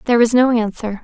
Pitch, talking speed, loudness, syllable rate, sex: 230 Hz, 230 wpm, -15 LUFS, 6.9 syllables/s, female